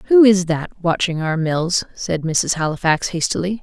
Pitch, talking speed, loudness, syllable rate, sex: 175 Hz, 165 wpm, -18 LUFS, 4.3 syllables/s, female